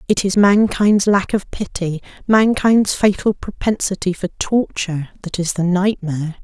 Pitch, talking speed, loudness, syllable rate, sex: 195 Hz, 140 wpm, -17 LUFS, 4.5 syllables/s, female